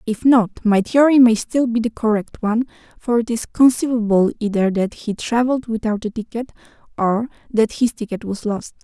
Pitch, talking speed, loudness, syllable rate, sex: 225 Hz, 185 wpm, -18 LUFS, 5.2 syllables/s, female